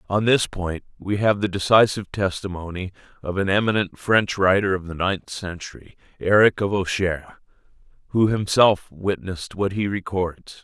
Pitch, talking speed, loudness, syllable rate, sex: 95 Hz, 145 wpm, -22 LUFS, 4.9 syllables/s, male